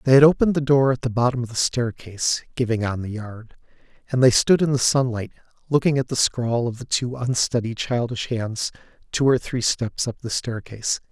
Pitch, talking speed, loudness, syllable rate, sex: 120 Hz, 205 wpm, -22 LUFS, 5.4 syllables/s, male